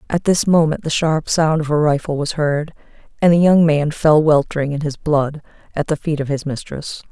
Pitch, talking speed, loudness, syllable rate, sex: 155 Hz, 220 wpm, -17 LUFS, 5.1 syllables/s, female